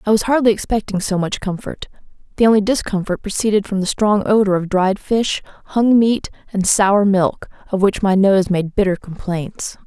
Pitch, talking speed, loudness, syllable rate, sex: 200 Hz, 180 wpm, -17 LUFS, 5.0 syllables/s, female